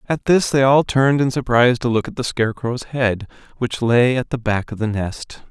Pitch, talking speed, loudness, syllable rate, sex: 125 Hz, 230 wpm, -18 LUFS, 5.2 syllables/s, male